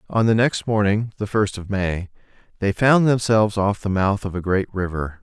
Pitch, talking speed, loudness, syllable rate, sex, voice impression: 100 Hz, 205 wpm, -20 LUFS, 4.9 syllables/s, male, masculine, adult-like, slightly thick, tensed, soft, muffled, cool, slightly mature, wild, lively, strict